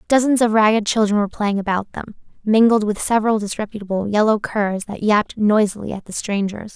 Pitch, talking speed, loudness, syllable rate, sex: 210 Hz, 180 wpm, -18 LUFS, 5.9 syllables/s, female